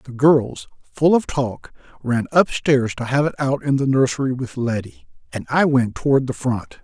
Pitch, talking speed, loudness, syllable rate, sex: 130 Hz, 200 wpm, -19 LUFS, 4.8 syllables/s, male